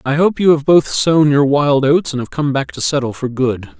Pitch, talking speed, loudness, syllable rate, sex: 140 Hz, 270 wpm, -14 LUFS, 4.9 syllables/s, male